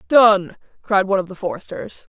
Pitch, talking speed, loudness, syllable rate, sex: 200 Hz, 165 wpm, -18 LUFS, 5.3 syllables/s, female